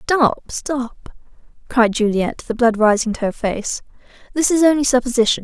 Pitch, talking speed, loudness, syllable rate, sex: 245 Hz, 155 wpm, -18 LUFS, 4.6 syllables/s, female